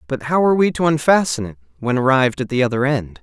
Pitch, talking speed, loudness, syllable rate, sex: 135 Hz, 240 wpm, -17 LUFS, 6.7 syllables/s, male